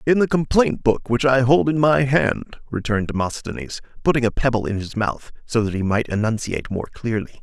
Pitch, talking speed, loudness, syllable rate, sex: 120 Hz, 200 wpm, -20 LUFS, 5.6 syllables/s, male